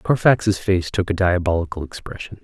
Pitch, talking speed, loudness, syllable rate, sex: 95 Hz, 150 wpm, -20 LUFS, 5.0 syllables/s, male